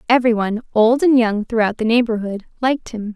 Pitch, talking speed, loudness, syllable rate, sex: 230 Hz, 170 wpm, -17 LUFS, 5.9 syllables/s, female